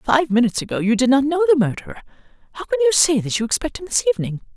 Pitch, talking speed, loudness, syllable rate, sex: 265 Hz, 250 wpm, -18 LUFS, 8.1 syllables/s, female